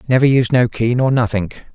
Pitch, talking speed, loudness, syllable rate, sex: 120 Hz, 205 wpm, -15 LUFS, 5.3 syllables/s, male